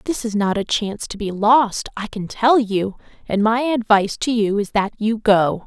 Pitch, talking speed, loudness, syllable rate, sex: 215 Hz, 220 wpm, -19 LUFS, 4.7 syllables/s, female